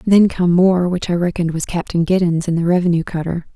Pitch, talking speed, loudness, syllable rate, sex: 175 Hz, 220 wpm, -17 LUFS, 5.9 syllables/s, female